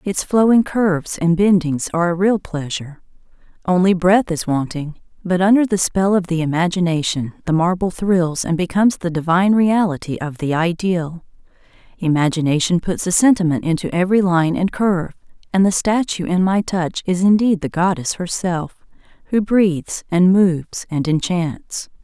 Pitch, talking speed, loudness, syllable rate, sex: 180 Hz, 155 wpm, -17 LUFS, 5.0 syllables/s, female